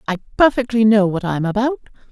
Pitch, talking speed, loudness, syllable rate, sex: 215 Hz, 170 wpm, -17 LUFS, 6.2 syllables/s, female